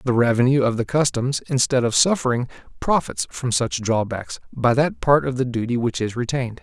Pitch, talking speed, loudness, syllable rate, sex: 125 Hz, 190 wpm, -21 LUFS, 5.4 syllables/s, male